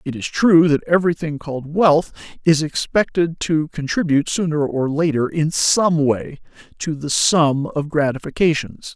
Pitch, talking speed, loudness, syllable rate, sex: 155 Hz, 145 wpm, -18 LUFS, 4.5 syllables/s, male